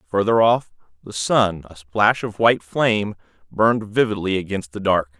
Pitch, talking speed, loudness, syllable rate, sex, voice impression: 100 Hz, 160 wpm, -20 LUFS, 5.0 syllables/s, male, masculine, adult-like, soft, slightly muffled, slightly intellectual, sincere, slightly reassuring, slightly wild, kind, slightly modest